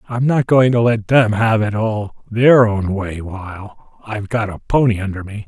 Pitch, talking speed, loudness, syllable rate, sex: 110 Hz, 210 wpm, -16 LUFS, 4.4 syllables/s, male